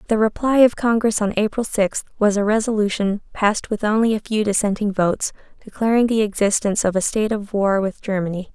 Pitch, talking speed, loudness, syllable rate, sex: 210 Hz, 190 wpm, -19 LUFS, 6.0 syllables/s, female